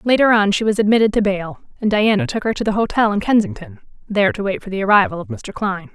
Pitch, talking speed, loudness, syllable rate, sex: 205 Hz, 250 wpm, -17 LUFS, 6.7 syllables/s, female